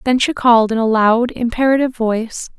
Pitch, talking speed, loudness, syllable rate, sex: 235 Hz, 185 wpm, -15 LUFS, 5.8 syllables/s, female